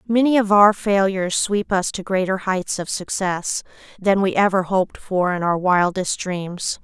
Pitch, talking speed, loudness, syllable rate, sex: 190 Hz, 175 wpm, -20 LUFS, 4.4 syllables/s, female